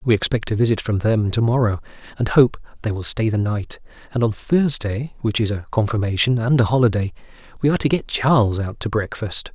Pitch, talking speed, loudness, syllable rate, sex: 115 Hz, 205 wpm, -20 LUFS, 5.6 syllables/s, male